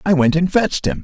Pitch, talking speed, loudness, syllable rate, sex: 150 Hz, 290 wpm, -16 LUFS, 6.5 syllables/s, male